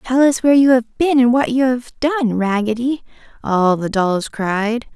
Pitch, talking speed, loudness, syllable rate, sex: 240 Hz, 195 wpm, -16 LUFS, 4.4 syllables/s, female